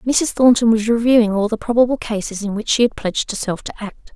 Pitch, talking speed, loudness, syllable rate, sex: 225 Hz, 230 wpm, -17 LUFS, 5.9 syllables/s, female